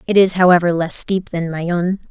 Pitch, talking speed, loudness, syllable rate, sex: 175 Hz, 200 wpm, -16 LUFS, 4.8 syllables/s, female